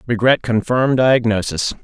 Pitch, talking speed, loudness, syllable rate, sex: 115 Hz, 100 wpm, -16 LUFS, 4.3 syllables/s, male